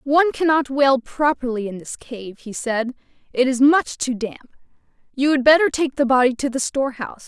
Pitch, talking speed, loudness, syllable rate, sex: 265 Hz, 190 wpm, -19 LUFS, 5.2 syllables/s, female